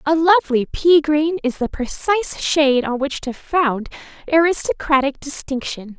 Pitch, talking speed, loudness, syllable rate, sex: 290 Hz, 140 wpm, -18 LUFS, 4.6 syllables/s, female